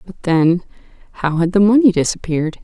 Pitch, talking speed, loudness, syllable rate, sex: 180 Hz, 135 wpm, -16 LUFS, 5.9 syllables/s, female